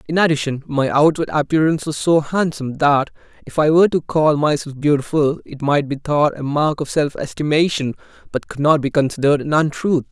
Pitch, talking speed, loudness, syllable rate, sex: 150 Hz, 190 wpm, -18 LUFS, 5.6 syllables/s, male